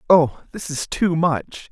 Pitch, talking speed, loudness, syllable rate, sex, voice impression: 155 Hz, 175 wpm, -20 LUFS, 3.6 syllables/s, male, masculine, adult-like, tensed, powerful, bright, clear, fluent, intellectual, sincere, slightly friendly, reassuring, wild, lively, slightly strict